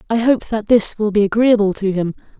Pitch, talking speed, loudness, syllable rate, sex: 210 Hz, 225 wpm, -16 LUFS, 5.7 syllables/s, female